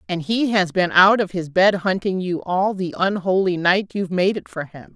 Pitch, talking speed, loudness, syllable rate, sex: 185 Hz, 230 wpm, -19 LUFS, 4.9 syllables/s, female